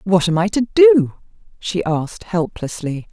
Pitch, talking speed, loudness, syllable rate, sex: 190 Hz, 155 wpm, -17 LUFS, 4.3 syllables/s, female